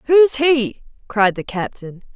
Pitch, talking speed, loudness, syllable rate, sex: 245 Hz, 140 wpm, -17 LUFS, 3.7 syllables/s, female